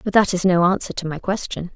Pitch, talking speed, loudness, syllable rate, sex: 180 Hz, 275 wpm, -20 LUFS, 6.1 syllables/s, female